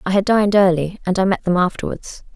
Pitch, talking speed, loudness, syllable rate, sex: 190 Hz, 230 wpm, -17 LUFS, 6.2 syllables/s, female